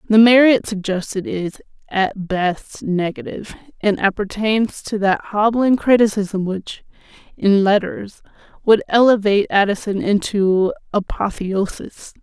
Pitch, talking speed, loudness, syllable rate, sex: 205 Hz, 105 wpm, -18 LUFS, 4.1 syllables/s, female